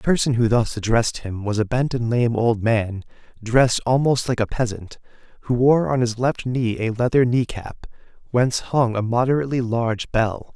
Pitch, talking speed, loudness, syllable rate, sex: 120 Hz, 195 wpm, -20 LUFS, 5.2 syllables/s, male